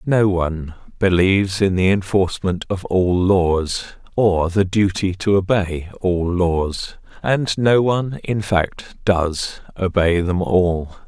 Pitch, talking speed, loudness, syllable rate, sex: 95 Hz, 135 wpm, -19 LUFS, 3.6 syllables/s, male